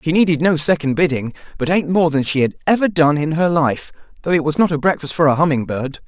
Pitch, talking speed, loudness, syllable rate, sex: 155 Hz, 255 wpm, -17 LUFS, 6.2 syllables/s, male